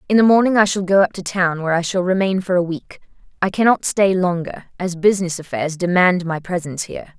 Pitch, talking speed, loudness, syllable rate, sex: 180 Hz, 215 wpm, -18 LUFS, 6.1 syllables/s, female